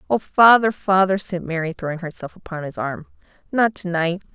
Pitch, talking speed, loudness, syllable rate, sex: 180 Hz, 165 wpm, -20 LUFS, 5.3 syllables/s, female